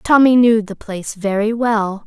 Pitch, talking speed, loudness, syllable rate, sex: 220 Hz, 175 wpm, -16 LUFS, 4.5 syllables/s, female